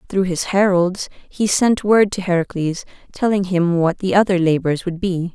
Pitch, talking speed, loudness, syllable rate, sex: 185 Hz, 180 wpm, -18 LUFS, 4.6 syllables/s, female